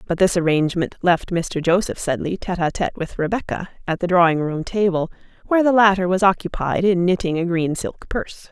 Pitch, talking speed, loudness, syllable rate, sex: 180 Hz, 195 wpm, -20 LUFS, 5.9 syllables/s, female